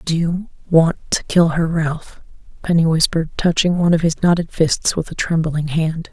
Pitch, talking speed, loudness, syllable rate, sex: 165 Hz, 175 wpm, -17 LUFS, 5.0 syllables/s, female